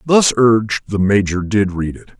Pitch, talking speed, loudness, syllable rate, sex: 105 Hz, 190 wpm, -16 LUFS, 4.8 syllables/s, male